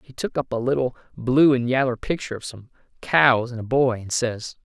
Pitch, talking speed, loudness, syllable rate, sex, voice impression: 125 Hz, 220 wpm, -22 LUFS, 5.3 syllables/s, male, masculine, adult-like, slightly thick, fluent, slightly sincere, slightly unique